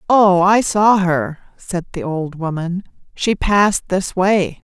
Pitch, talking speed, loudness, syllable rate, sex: 185 Hz, 155 wpm, -16 LUFS, 3.7 syllables/s, female